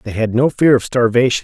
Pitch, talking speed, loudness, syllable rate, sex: 120 Hz, 250 wpm, -14 LUFS, 5.9 syllables/s, male